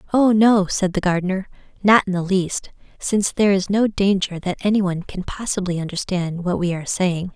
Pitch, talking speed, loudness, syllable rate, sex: 190 Hz, 190 wpm, -20 LUFS, 5.4 syllables/s, female